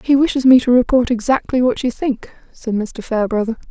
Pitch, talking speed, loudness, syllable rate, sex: 245 Hz, 195 wpm, -16 LUFS, 5.8 syllables/s, female